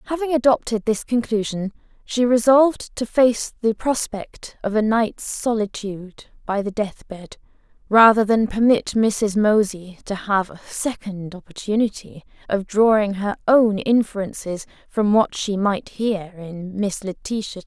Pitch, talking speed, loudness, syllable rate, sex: 215 Hz, 140 wpm, -20 LUFS, 4.3 syllables/s, female